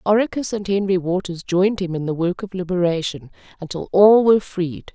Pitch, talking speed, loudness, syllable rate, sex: 185 Hz, 180 wpm, -19 LUFS, 5.5 syllables/s, female